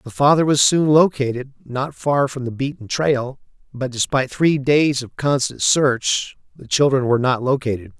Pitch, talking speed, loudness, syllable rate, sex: 135 Hz, 175 wpm, -18 LUFS, 4.7 syllables/s, male